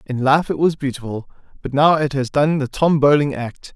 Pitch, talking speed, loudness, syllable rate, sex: 140 Hz, 225 wpm, -18 LUFS, 5.2 syllables/s, male